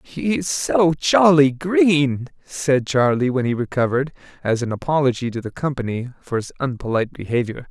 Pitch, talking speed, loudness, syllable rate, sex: 135 Hz, 155 wpm, -20 LUFS, 5.1 syllables/s, male